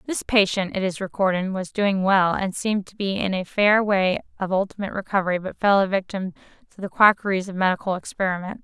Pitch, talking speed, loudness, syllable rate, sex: 195 Hz, 200 wpm, -22 LUFS, 6.0 syllables/s, female